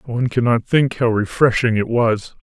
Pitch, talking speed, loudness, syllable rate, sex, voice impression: 120 Hz, 175 wpm, -17 LUFS, 4.9 syllables/s, male, masculine, very middle-aged, slightly thick, muffled, sincere, slightly unique